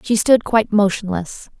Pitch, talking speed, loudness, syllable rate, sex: 205 Hz, 150 wpm, -17 LUFS, 4.9 syllables/s, female